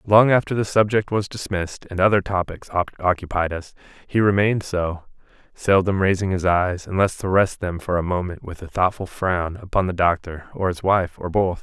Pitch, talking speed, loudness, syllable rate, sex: 95 Hz, 190 wpm, -21 LUFS, 5.2 syllables/s, male